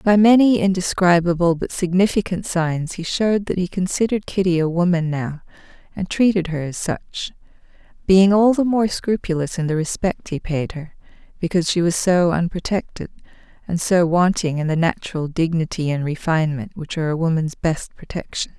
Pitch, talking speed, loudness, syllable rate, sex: 175 Hz, 165 wpm, -19 LUFS, 5.3 syllables/s, female